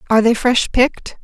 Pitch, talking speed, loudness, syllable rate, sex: 235 Hz, 195 wpm, -15 LUFS, 6.1 syllables/s, female